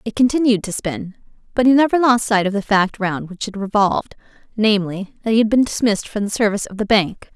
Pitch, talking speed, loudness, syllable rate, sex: 210 Hz, 230 wpm, -18 LUFS, 6.1 syllables/s, female